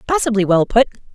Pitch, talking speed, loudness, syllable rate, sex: 220 Hz, 155 wpm, -16 LUFS, 6.8 syllables/s, female